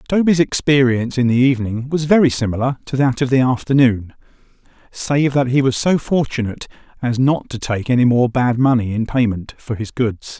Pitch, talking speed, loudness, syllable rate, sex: 130 Hz, 185 wpm, -17 LUFS, 5.4 syllables/s, male